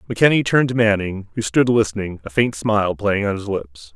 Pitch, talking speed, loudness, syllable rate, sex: 105 Hz, 215 wpm, -19 LUFS, 6.1 syllables/s, male